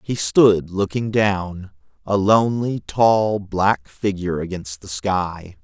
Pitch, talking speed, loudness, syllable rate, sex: 95 Hz, 130 wpm, -20 LUFS, 3.5 syllables/s, male